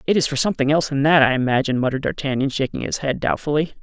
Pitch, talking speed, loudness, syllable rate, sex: 140 Hz, 235 wpm, -20 LUFS, 7.7 syllables/s, male